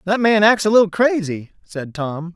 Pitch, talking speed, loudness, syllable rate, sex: 190 Hz, 205 wpm, -16 LUFS, 4.8 syllables/s, male